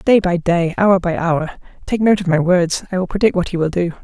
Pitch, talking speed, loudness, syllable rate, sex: 180 Hz, 240 wpm, -16 LUFS, 5.8 syllables/s, female